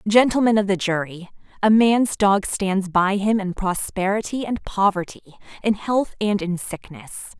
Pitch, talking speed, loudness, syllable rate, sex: 200 Hz, 155 wpm, -20 LUFS, 4.5 syllables/s, female